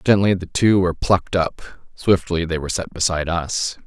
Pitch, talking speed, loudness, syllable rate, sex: 90 Hz, 185 wpm, -20 LUFS, 5.6 syllables/s, male